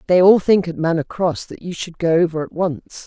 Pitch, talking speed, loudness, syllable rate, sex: 170 Hz, 255 wpm, -18 LUFS, 5.2 syllables/s, female